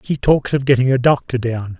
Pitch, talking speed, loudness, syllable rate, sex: 130 Hz, 235 wpm, -16 LUFS, 5.3 syllables/s, male